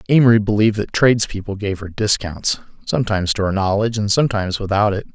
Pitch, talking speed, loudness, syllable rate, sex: 105 Hz, 175 wpm, -18 LUFS, 6.9 syllables/s, male